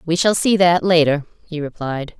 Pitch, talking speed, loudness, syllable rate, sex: 165 Hz, 190 wpm, -17 LUFS, 4.8 syllables/s, female